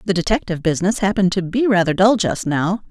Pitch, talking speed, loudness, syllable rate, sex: 190 Hz, 205 wpm, -18 LUFS, 6.7 syllables/s, female